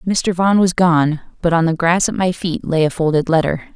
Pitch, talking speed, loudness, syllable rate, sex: 170 Hz, 240 wpm, -16 LUFS, 5.3 syllables/s, female